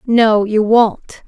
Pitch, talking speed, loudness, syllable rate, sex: 220 Hz, 140 wpm, -13 LUFS, 3.3 syllables/s, female